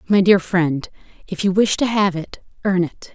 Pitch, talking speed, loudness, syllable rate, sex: 185 Hz, 210 wpm, -18 LUFS, 4.6 syllables/s, female